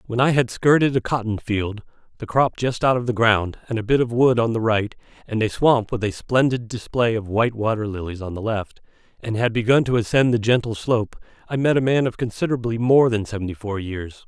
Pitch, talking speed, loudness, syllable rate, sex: 115 Hz, 225 wpm, -21 LUFS, 5.7 syllables/s, male